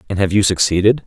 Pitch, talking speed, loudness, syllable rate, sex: 100 Hz, 225 wpm, -15 LUFS, 6.7 syllables/s, male